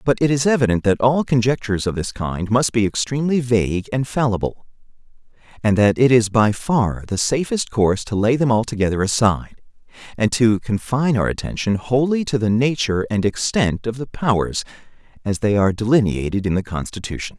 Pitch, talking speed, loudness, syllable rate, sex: 115 Hz, 175 wpm, -19 LUFS, 5.6 syllables/s, male